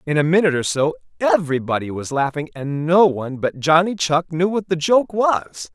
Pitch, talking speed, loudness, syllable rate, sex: 160 Hz, 200 wpm, -19 LUFS, 5.3 syllables/s, male